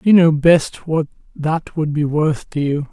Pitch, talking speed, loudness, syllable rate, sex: 155 Hz, 205 wpm, -17 LUFS, 3.9 syllables/s, male